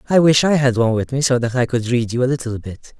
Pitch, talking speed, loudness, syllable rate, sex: 125 Hz, 320 wpm, -17 LUFS, 6.5 syllables/s, male